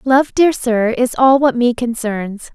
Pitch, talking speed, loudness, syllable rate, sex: 245 Hz, 190 wpm, -15 LUFS, 3.7 syllables/s, female